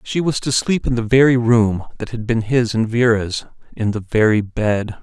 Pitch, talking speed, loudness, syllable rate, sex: 115 Hz, 215 wpm, -17 LUFS, 4.7 syllables/s, male